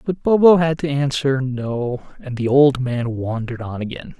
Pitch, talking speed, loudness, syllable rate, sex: 135 Hz, 185 wpm, -19 LUFS, 4.6 syllables/s, male